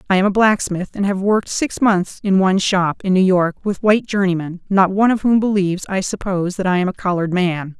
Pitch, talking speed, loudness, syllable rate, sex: 190 Hz, 240 wpm, -17 LUFS, 6.0 syllables/s, female